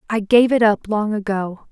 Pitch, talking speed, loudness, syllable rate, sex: 210 Hz, 210 wpm, -17 LUFS, 4.6 syllables/s, female